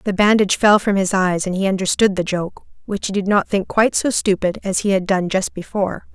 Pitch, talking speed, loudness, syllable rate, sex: 195 Hz, 245 wpm, -18 LUFS, 5.7 syllables/s, female